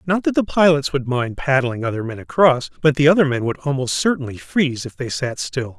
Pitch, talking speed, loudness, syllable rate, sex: 140 Hz, 230 wpm, -19 LUFS, 5.6 syllables/s, male